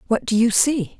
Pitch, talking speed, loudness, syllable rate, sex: 225 Hz, 240 wpm, -18 LUFS, 4.9 syllables/s, female